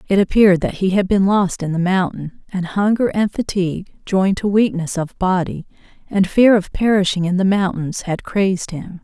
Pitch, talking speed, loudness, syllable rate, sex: 190 Hz, 195 wpm, -17 LUFS, 5.1 syllables/s, female